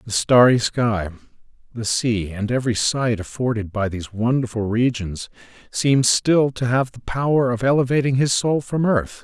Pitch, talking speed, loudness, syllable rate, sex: 120 Hz, 160 wpm, -20 LUFS, 4.7 syllables/s, male